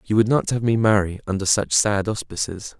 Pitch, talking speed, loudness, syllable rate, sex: 100 Hz, 215 wpm, -20 LUFS, 5.3 syllables/s, male